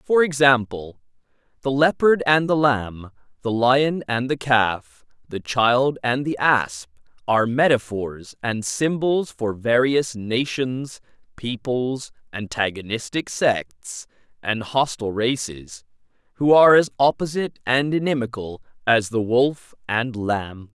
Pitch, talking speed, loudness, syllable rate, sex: 125 Hz, 120 wpm, -21 LUFS, 3.8 syllables/s, male